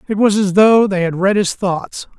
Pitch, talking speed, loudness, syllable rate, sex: 195 Hz, 245 wpm, -14 LUFS, 4.6 syllables/s, male